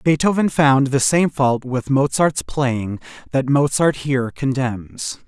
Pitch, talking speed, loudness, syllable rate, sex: 135 Hz, 135 wpm, -18 LUFS, 3.9 syllables/s, male